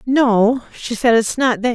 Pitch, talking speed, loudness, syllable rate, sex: 235 Hz, 205 wpm, -16 LUFS, 4.0 syllables/s, female